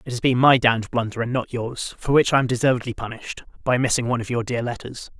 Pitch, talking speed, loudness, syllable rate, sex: 120 Hz, 255 wpm, -21 LUFS, 6.7 syllables/s, male